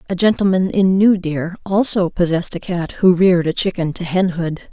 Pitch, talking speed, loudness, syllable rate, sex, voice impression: 180 Hz, 205 wpm, -17 LUFS, 5.3 syllables/s, female, very feminine, slightly young, very adult-like, thin, tensed, powerful, dark, hard, very clear, very fluent, slightly raspy, cute, very intellectual, refreshing, sincere, very calm, friendly, reassuring, very unique, very elegant, wild, very sweet, slightly lively, slightly strict, slightly intense, slightly modest, light